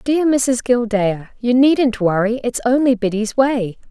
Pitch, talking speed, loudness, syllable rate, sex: 235 Hz, 155 wpm, -17 LUFS, 4.0 syllables/s, female